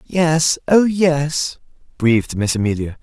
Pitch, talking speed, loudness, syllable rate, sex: 145 Hz, 100 wpm, -17 LUFS, 3.7 syllables/s, male